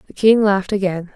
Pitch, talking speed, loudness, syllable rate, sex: 195 Hz, 210 wpm, -16 LUFS, 6.3 syllables/s, female